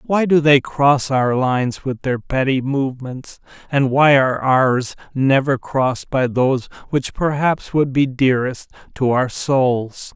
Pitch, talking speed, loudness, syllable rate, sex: 135 Hz, 155 wpm, -17 LUFS, 4.1 syllables/s, male